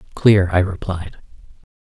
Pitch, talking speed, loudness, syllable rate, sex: 95 Hz, 95 wpm, -18 LUFS, 4.4 syllables/s, male